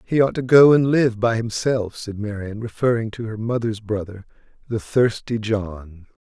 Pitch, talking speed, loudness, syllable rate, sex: 110 Hz, 175 wpm, -20 LUFS, 4.5 syllables/s, male